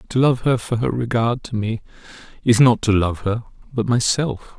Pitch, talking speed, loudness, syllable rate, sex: 115 Hz, 195 wpm, -19 LUFS, 4.8 syllables/s, male